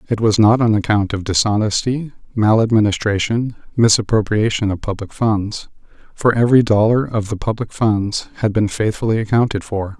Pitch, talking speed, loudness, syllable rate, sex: 110 Hz, 145 wpm, -17 LUFS, 5.2 syllables/s, male